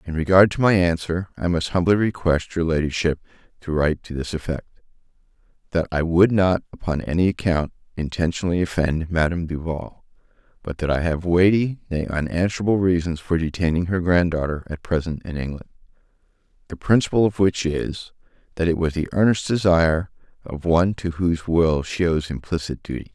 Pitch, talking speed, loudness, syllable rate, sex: 85 Hz, 165 wpm, -21 LUFS, 5.6 syllables/s, male